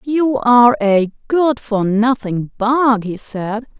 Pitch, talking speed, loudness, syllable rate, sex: 230 Hz, 140 wpm, -15 LUFS, 3.3 syllables/s, female